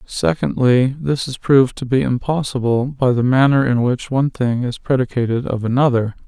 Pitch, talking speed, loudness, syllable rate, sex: 130 Hz, 170 wpm, -17 LUFS, 5.1 syllables/s, male